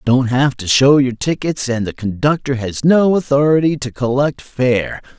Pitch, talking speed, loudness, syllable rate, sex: 130 Hz, 175 wpm, -15 LUFS, 4.5 syllables/s, male